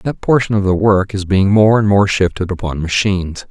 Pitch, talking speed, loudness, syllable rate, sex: 100 Hz, 225 wpm, -14 LUFS, 5.2 syllables/s, male